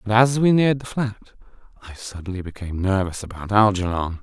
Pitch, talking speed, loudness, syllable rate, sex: 105 Hz, 170 wpm, -21 LUFS, 5.7 syllables/s, male